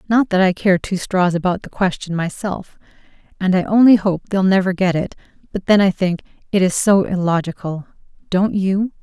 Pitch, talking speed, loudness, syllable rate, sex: 190 Hz, 180 wpm, -17 LUFS, 5.1 syllables/s, female